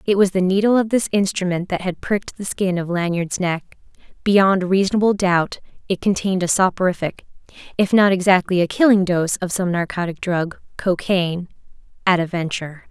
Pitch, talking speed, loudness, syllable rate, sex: 185 Hz, 165 wpm, -19 LUFS, 5.4 syllables/s, female